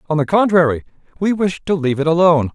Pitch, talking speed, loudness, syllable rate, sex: 165 Hz, 210 wpm, -16 LUFS, 7.0 syllables/s, male